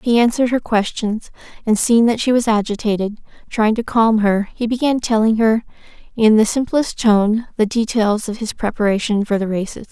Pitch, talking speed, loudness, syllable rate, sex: 220 Hz, 180 wpm, -17 LUFS, 5.1 syllables/s, female